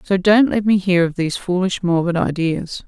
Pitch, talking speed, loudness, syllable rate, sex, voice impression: 180 Hz, 210 wpm, -17 LUFS, 5.1 syllables/s, female, gender-neutral, adult-like, tensed, powerful, clear, fluent, slightly cool, intellectual, calm, slightly unique, lively, strict, slightly sharp